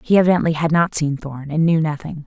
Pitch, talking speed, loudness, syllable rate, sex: 155 Hz, 240 wpm, -18 LUFS, 6.0 syllables/s, female